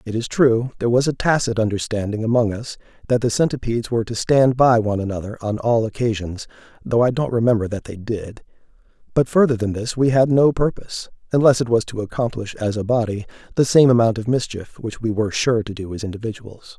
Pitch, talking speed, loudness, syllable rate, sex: 115 Hz, 205 wpm, -20 LUFS, 6.0 syllables/s, male